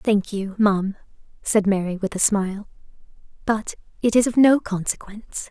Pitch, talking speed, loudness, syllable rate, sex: 205 Hz, 155 wpm, -21 LUFS, 5.0 syllables/s, female